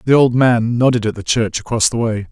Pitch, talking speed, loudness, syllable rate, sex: 115 Hz, 260 wpm, -15 LUFS, 5.6 syllables/s, male